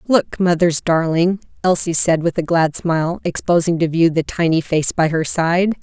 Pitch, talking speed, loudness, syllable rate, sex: 170 Hz, 185 wpm, -17 LUFS, 4.6 syllables/s, female